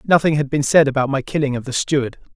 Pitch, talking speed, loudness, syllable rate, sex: 140 Hz, 255 wpm, -18 LUFS, 6.7 syllables/s, male